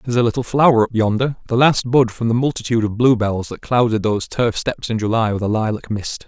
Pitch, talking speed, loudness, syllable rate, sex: 115 Hz, 240 wpm, -18 LUFS, 6.2 syllables/s, male